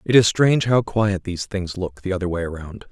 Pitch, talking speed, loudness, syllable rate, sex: 100 Hz, 245 wpm, -21 LUFS, 5.3 syllables/s, male